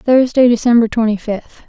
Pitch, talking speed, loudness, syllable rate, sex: 230 Hz, 145 wpm, -13 LUFS, 4.9 syllables/s, female